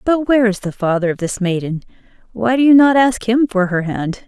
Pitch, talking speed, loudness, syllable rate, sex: 215 Hz, 225 wpm, -15 LUFS, 5.5 syllables/s, female